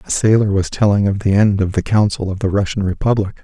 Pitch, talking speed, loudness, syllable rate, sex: 100 Hz, 245 wpm, -16 LUFS, 6.2 syllables/s, male